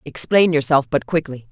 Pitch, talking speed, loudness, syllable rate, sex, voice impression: 150 Hz, 120 wpm, -18 LUFS, 5.0 syllables/s, female, feminine, middle-aged, tensed, powerful, clear, fluent, intellectual, unique, lively, slightly intense, slightly sharp